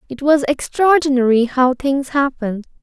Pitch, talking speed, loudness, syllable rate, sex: 270 Hz, 125 wpm, -16 LUFS, 4.9 syllables/s, female